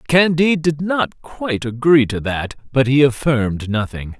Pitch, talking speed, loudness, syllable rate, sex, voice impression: 135 Hz, 155 wpm, -17 LUFS, 4.6 syllables/s, male, very masculine, very middle-aged, thick, tensed, slightly powerful, slightly bright, slightly soft, clear, fluent, slightly raspy, slightly cool, slightly intellectual, refreshing, slightly sincere, calm, mature, slightly friendly, slightly reassuring, very unique, wild, very lively, intense, sharp